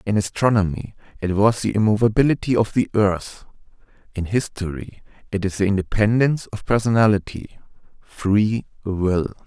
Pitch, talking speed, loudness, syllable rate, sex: 105 Hz, 115 wpm, -20 LUFS, 5.1 syllables/s, male